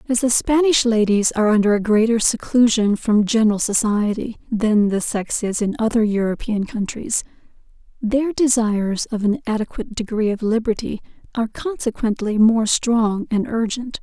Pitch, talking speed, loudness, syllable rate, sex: 220 Hz, 145 wpm, -19 LUFS, 4.9 syllables/s, female